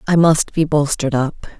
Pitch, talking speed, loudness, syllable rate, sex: 150 Hz, 190 wpm, -17 LUFS, 5.2 syllables/s, female